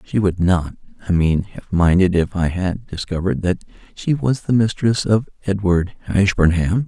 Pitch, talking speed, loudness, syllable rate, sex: 95 Hz, 165 wpm, -19 LUFS, 4.6 syllables/s, male